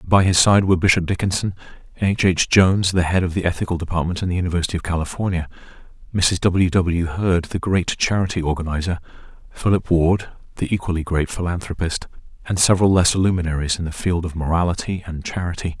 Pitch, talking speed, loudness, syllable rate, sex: 90 Hz, 170 wpm, -20 LUFS, 6.2 syllables/s, male